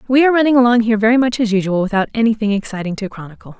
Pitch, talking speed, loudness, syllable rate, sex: 225 Hz, 235 wpm, -15 LUFS, 8.0 syllables/s, female